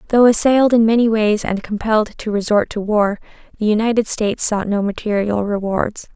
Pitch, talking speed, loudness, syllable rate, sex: 215 Hz, 175 wpm, -17 LUFS, 5.5 syllables/s, female